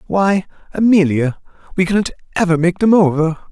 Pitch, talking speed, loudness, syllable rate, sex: 180 Hz, 135 wpm, -15 LUFS, 4.9 syllables/s, male